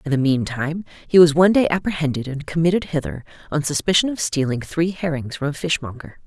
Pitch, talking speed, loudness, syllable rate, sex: 155 Hz, 200 wpm, -20 LUFS, 6.0 syllables/s, female